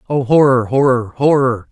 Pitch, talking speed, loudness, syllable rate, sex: 130 Hz, 140 wpm, -14 LUFS, 4.7 syllables/s, male